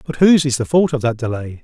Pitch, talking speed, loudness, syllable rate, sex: 135 Hz, 295 wpm, -16 LUFS, 6.5 syllables/s, male